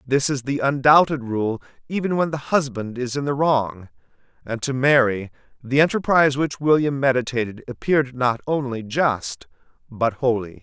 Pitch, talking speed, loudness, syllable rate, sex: 130 Hz, 155 wpm, -21 LUFS, 4.9 syllables/s, male